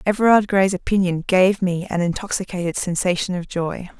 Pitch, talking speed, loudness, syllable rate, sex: 185 Hz, 150 wpm, -20 LUFS, 5.3 syllables/s, female